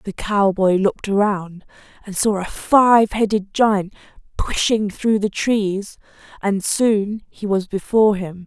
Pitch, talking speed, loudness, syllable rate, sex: 205 Hz, 140 wpm, -19 LUFS, 3.8 syllables/s, female